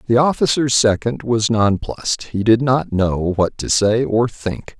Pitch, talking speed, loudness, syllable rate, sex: 115 Hz, 175 wpm, -17 LUFS, 4.1 syllables/s, male